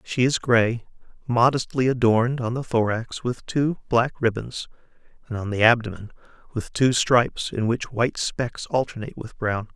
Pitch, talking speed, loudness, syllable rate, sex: 120 Hz, 160 wpm, -23 LUFS, 4.8 syllables/s, male